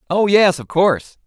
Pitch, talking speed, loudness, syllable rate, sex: 175 Hz, 190 wpm, -16 LUFS, 5.0 syllables/s, male